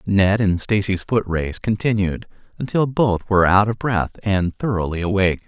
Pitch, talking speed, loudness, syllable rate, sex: 100 Hz, 165 wpm, -19 LUFS, 4.8 syllables/s, male